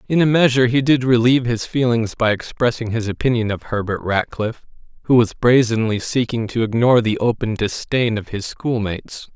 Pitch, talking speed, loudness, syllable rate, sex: 115 Hz, 175 wpm, -18 LUFS, 5.4 syllables/s, male